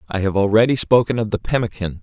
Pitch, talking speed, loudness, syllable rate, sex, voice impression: 105 Hz, 205 wpm, -18 LUFS, 6.6 syllables/s, male, masculine, adult-like, tensed, powerful, hard, clear, cool, intellectual, sincere, calm, friendly, wild, lively